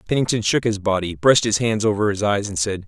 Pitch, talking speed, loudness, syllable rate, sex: 105 Hz, 250 wpm, -19 LUFS, 6.3 syllables/s, male